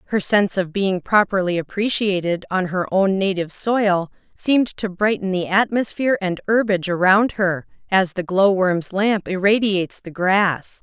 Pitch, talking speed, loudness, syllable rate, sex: 190 Hz, 150 wpm, -19 LUFS, 4.7 syllables/s, female